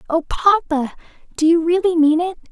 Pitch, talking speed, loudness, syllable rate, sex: 330 Hz, 165 wpm, -17 LUFS, 5.1 syllables/s, female